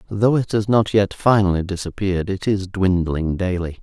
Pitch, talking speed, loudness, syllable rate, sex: 95 Hz, 170 wpm, -19 LUFS, 5.0 syllables/s, male